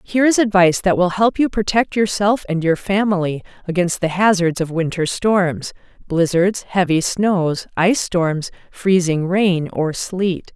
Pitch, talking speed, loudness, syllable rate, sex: 185 Hz, 150 wpm, -17 LUFS, 4.3 syllables/s, female